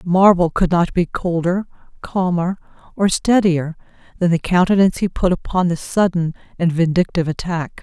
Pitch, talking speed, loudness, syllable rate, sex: 175 Hz, 145 wpm, -18 LUFS, 5.0 syllables/s, female